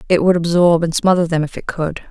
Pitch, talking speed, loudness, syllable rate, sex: 170 Hz, 255 wpm, -16 LUFS, 5.9 syllables/s, female